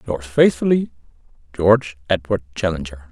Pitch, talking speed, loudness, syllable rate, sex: 95 Hz, 95 wpm, -19 LUFS, 5.3 syllables/s, male